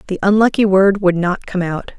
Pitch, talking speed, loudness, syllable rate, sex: 190 Hz, 210 wpm, -15 LUFS, 5.1 syllables/s, female